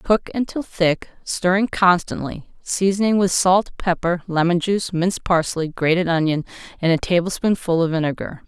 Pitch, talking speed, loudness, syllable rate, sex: 180 Hz, 140 wpm, -20 LUFS, 5.0 syllables/s, female